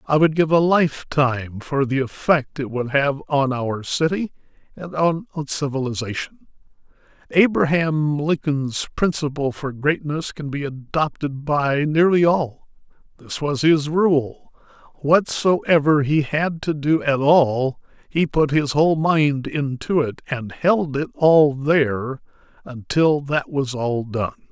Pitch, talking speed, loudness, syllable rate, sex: 145 Hz, 135 wpm, -20 LUFS, 4.0 syllables/s, male